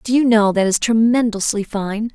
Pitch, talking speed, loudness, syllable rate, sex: 220 Hz, 195 wpm, -17 LUFS, 4.7 syllables/s, female